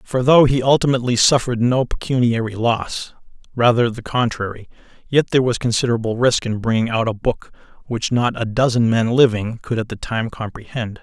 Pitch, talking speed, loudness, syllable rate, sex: 120 Hz, 175 wpm, -18 LUFS, 5.6 syllables/s, male